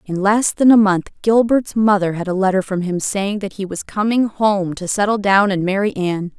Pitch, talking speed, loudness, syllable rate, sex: 200 Hz, 225 wpm, -17 LUFS, 5.1 syllables/s, female